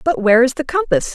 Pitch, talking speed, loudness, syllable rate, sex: 265 Hz, 260 wpm, -15 LUFS, 6.7 syllables/s, female